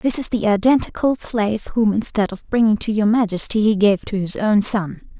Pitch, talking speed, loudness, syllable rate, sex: 215 Hz, 210 wpm, -18 LUFS, 5.2 syllables/s, female